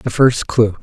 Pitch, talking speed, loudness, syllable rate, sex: 115 Hz, 220 wpm, -15 LUFS, 4.0 syllables/s, male